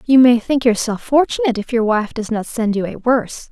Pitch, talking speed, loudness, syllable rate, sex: 235 Hz, 240 wpm, -17 LUFS, 5.6 syllables/s, female